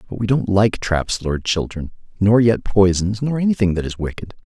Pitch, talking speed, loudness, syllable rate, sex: 100 Hz, 190 wpm, -18 LUFS, 5.2 syllables/s, male